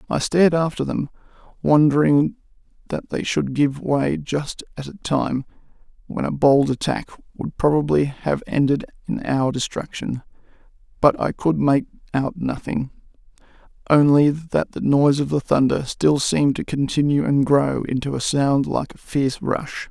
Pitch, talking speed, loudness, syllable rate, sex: 145 Hz, 155 wpm, -20 LUFS, 4.6 syllables/s, male